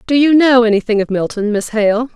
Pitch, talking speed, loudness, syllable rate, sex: 235 Hz, 225 wpm, -13 LUFS, 5.5 syllables/s, female